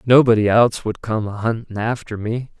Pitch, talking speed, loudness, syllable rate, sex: 110 Hz, 185 wpm, -19 LUFS, 5.3 syllables/s, male